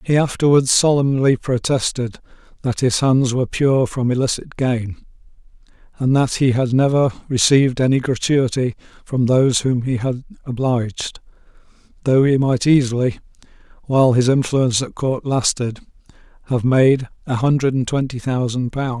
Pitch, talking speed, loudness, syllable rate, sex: 130 Hz, 140 wpm, -18 LUFS, 4.9 syllables/s, male